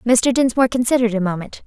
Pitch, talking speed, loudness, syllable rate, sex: 235 Hz, 180 wpm, -17 LUFS, 7.1 syllables/s, female